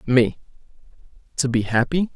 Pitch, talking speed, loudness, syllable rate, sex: 130 Hz, 110 wpm, -21 LUFS, 4.8 syllables/s, male